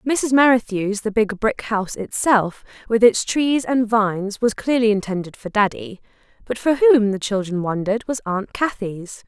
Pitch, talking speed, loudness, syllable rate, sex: 220 Hz, 170 wpm, -19 LUFS, 4.7 syllables/s, female